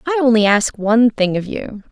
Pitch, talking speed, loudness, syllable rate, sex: 230 Hz, 220 wpm, -15 LUFS, 5.4 syllables/s, female